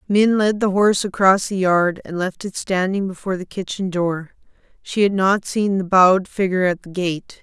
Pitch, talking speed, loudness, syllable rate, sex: 190 Hz, 200 wpm, -19 LUFS, 5.0 syllables/s, female